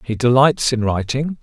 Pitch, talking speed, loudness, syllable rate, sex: 125 Hz, 170 wpm, -17 LUFS, 4.6 syllables/s, male